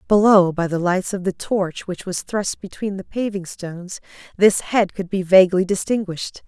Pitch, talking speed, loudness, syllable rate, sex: 190 Hz, 185 wpm, -20 LUFS, 4.9 syllables/s, female